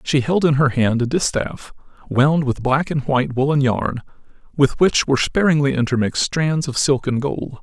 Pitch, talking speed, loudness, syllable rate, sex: 140 Hz, 190 wpm, -18 LUFS, 5.0 syllables/s, male